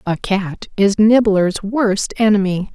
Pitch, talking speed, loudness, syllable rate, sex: 200 Hz, 130 wpm, -16 LUFS, 3.6 syllables/s, female